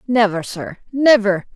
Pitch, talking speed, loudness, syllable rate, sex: 220 Hz, 115 wpm, -16 LUFS, 4.1 syllables/s, female